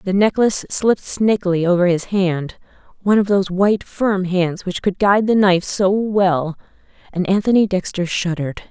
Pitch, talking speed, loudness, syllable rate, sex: 190 Hz, 150 wpm, -17 LUFS, 5.3 syllables/s, female